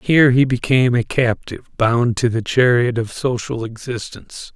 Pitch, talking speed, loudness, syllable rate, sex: 120 Hz, 160 wpm, -17 LUFS, 5.0 syllables/s, male